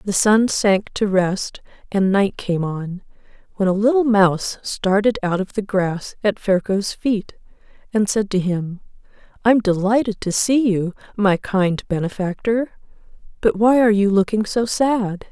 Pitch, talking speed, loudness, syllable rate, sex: 205 Hz, 155 wpm, -19 LUFS, 4.2 syllables/s, female